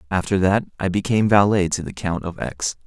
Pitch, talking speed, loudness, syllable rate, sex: 95 Hz, 210 wpm, -20 LUFS, 5.7 syllables/s, male